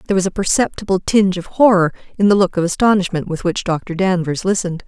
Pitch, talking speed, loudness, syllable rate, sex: 185 Hz, 210 wpm, -16 LUFS, 6.5 syllables/s, female